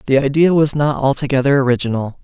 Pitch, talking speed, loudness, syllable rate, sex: 140 Hz, 160 wpm, -15 LUFS, 6.3 syllables/s, male